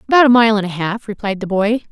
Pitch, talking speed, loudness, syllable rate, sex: 215 Hz, 285 wpm, -15 LUFS, 6.6 syllables/s, female